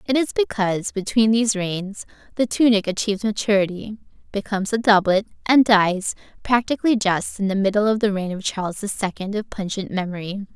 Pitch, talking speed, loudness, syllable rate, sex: 205 Hz, 170 wpm, -21 LUFS, 5.7 syllables/s, female